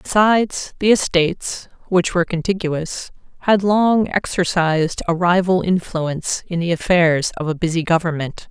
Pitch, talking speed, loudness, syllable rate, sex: 175 Hz, 135 wpm, -18 LUFS, 4.7 syllables/s, female